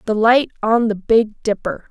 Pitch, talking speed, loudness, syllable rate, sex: 220 Hz, 190 wpm, -17 LUFS, 4.4 syllables/s, female